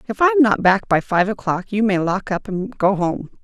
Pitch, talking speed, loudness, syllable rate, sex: 205 Hz, 260 wpm, -18 LUFS, 5.1 syllables/s, female